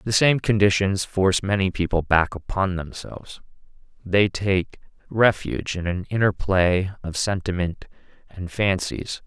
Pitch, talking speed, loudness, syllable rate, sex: 95 Hz, 130 wpm, -22 LUFS, 4.4 syllables/s, male